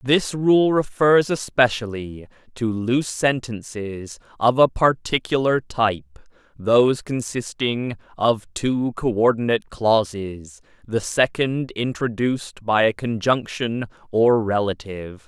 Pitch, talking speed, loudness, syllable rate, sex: 120 Hz, 100 wpm, -21 LUFS, 4.0 syllables/s, male